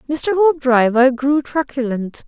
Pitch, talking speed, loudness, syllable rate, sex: 270 Hz, 105 wpm, -16 LUFS, 3.8 syllables/s, female